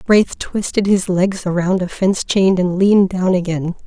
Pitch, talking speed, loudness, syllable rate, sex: 185 Hz, 185 wpm, -16 LUFS, 4.6 syllables/s, female